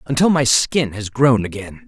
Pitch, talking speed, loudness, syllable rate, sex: 130 Hz, 190 wpm, -17 LUFS, 4.6 syllables/s, male